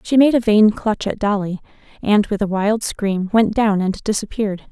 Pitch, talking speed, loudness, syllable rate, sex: 210 Hz, 205 wpm, -18 LUFS, 4.8 syllables/s, female